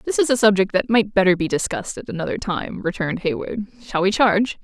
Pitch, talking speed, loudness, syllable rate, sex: 200 Hz, 220 wpm, -20 LUFS, 6.4 syllables/s, female